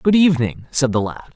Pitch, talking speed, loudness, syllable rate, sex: 140 Hz, 220 wpm, -18 LUFS, 5.9 syllables/s, male